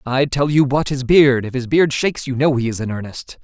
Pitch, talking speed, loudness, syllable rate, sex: 135 Hz, 260 wpm, -17 LUFS, 5.5 syllables/s, male